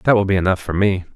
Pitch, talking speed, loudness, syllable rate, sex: 95 Hz, 310 wpm, -18 LUFS, 6.7 syllables/s, male